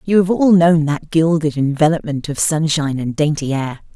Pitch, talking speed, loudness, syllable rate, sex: 155 Hz, 180 wpm, -16 LUFS, 5.0 syllables/s, female